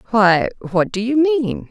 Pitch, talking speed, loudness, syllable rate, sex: 220 Hz, 175 wpm, -17 LUFS, 3.7 syllables/s, female